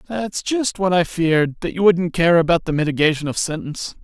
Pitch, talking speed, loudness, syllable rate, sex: 170 Hz, 210 wpm, -19 LUFS, 5.6 syllables/s, male